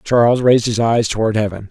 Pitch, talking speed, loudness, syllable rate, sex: 115 Hz, 210 wpm, -15 LUFS, 6.2 syllables/s, male